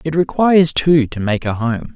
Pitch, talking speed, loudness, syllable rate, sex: 140 Hz, 215 wpm, -15 LUFS, 4.9 syllables/s, male